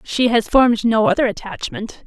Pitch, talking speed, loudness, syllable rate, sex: 230 Hz, 175 wpm, -17 LUFS, 5.1 syllables/s, female